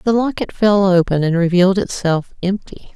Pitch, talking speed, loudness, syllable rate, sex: 190 Hz, 140 wpm, -16 LUFS, 5.1 syllables/s, female